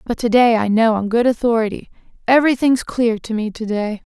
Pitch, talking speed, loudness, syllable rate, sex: 230 Hz, 205 wpm, -17 LUFS, 5.6 syllables/s, female